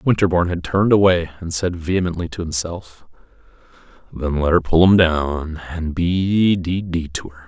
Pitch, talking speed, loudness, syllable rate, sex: 85 Hz, 160 wpm, -19 LUFS, 4.9 syllables/s, male